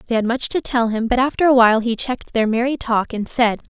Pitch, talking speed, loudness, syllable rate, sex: 235 Hz, 270 wpm, -18 LUFS, 6.1 syllables/s, female